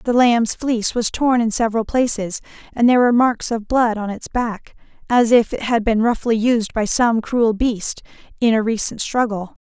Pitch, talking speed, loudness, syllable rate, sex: 230 Hz, 200 wpm, -18 LUFS, 4.8 syllables/s, female